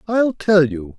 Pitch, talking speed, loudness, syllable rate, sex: 175 Hz, 185 wpm, -17 LUFS, 3.6 syllables/s, male